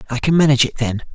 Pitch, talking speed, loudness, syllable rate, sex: 135 Hz, 260 wpm, -16 LUFS, 8.3 syllables/s, male